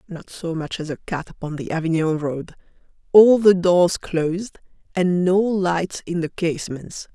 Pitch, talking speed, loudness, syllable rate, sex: 175 Hz, 160 wpm, -20 LUFS, 4.4 syllables/s, female